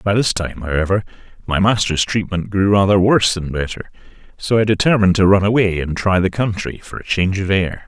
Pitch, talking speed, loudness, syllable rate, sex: 95 Hz, 205 wpm, -17 LUFS, 5.8 syllables/s, male